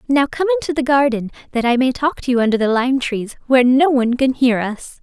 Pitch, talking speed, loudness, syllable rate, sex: 260 Hz, 250 wpm, -17 LUFS, 6.1 syllables/s, female